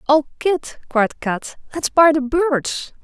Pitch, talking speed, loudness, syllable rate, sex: 290 Hz, 160 wpm, -19 LUFS, 3.3 syllables/s, female